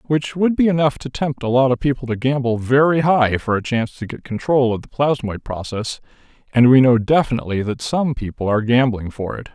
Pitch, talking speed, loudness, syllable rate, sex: 130 Hz, 215 wpm, -18 LUFS, 5.6 syllables/s, male